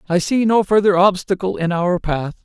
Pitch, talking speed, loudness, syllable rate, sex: 185 Hz, 195 wpm, -17 LUFS, 4.9 syllables/s, male